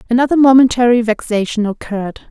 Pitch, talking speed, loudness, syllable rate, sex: 235 Hz, 105 wpm, -13 LUFS, 6.4 syllables/s, female